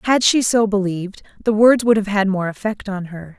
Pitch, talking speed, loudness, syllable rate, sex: 205 Hz, 230 wpm, -17 LUFS, 5.3 syllables/s, female